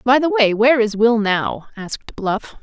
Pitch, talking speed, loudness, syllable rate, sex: 230 Hz, 205 wpm, -17 LUFS, 4.7 syllables/s, female